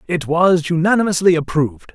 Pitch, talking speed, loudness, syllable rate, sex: 165 Hz, 125 wpm, -16 LUFS, 5.6 syllables/s, male